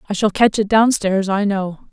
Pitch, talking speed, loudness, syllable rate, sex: 205 Hz, 250 wpm, -17 LUFS, 4.6 syllables/s, female